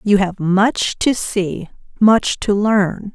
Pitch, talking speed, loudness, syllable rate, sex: 200 Hz, 155 wpm, -16 LUFS, 2.9 syllables/s, female